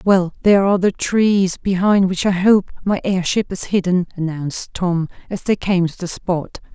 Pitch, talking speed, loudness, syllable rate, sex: 185 Hz, 185 wpm, -18 LUFS, 4.7 syllables/s, female